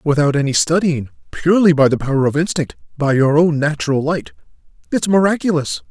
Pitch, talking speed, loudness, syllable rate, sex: 150 Hz, 155 wpm, -16 LUFS, 5.9 syllables/s, male